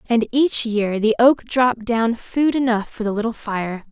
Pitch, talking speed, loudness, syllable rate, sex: 230 Hz, 200 wpm, -19 LUFS, 4.4 syllables/s, female